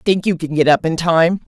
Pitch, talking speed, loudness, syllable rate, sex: 170 Hz, 270 wpm, -16 LUFS, 4.8 syllables/s, female